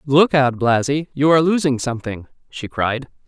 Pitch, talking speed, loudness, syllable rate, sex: 135 Hz, 165 wpm, -18 LUFS, 5.1 syllables/s, female